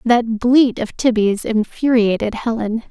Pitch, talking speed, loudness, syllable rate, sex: 230 Hz, 125 wpm, -17 LUFS, 4.0 syllables/s, female